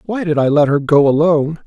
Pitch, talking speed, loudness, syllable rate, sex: 155 Hz, 250 wpm, -14 LUFS, 5.7 syllables/s, male